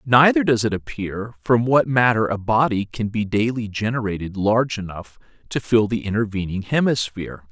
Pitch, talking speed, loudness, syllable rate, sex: 110 Hz, 160 wpm, -20 LUFS, 5.1 syllables/s, male